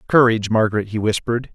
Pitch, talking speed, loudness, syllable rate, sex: 110 Hz, 155 wpm, -18 LUFS, 7.3 syllables/s, male